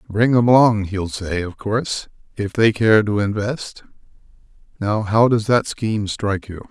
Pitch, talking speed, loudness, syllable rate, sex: 110 Hz, 170 wpm, -19 LUFS, 4.6 syllables/s, male